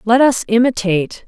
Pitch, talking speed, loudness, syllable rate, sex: 225 Hz, 140 wpm, -15 LUFS, 5.1 syllables/s, female